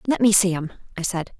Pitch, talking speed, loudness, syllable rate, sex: 190 Hz, 260 wpm, -21 LUFS, 6.2 syllables/s, female